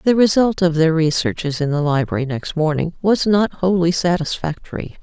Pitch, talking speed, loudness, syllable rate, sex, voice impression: 170 Hz, 165 wpm, -18 LUFS, 5.2 syllables/s, female, masculine, slightly young, adult-like, slightly thick, tensed, slightly weak, slightly dark, slightly muffled, slightly halting